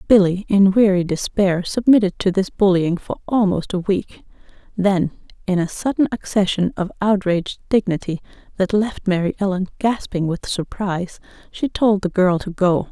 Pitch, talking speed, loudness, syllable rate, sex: 190 Hz, 155 wpm, -19 LUFS, 4.9 syllables/s, female